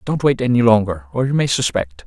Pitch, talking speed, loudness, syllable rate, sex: 115 Hz, 235 wpm, -17 LUFS, 5.8 syllables/s, male